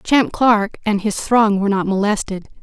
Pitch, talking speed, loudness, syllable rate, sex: 210 Hz, 185 wpm, -17 LUFS, 4.8 syllables/s, female